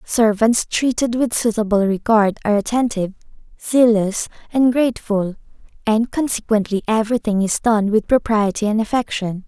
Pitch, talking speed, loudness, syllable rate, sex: 220 Hz, 125 wpm, -18 LUFS, 5.1 syllables/s, female